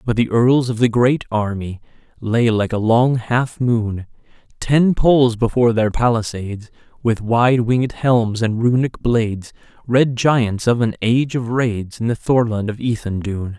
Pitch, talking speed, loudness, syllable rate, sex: 115 Hz, 165 wpm, -17 LUFS, 4.4 syllables/s, male